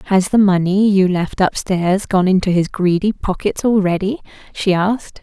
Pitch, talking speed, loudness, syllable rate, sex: 190 Hz, 160 wpm, -16 LUFS, 4.7 syllables/s, female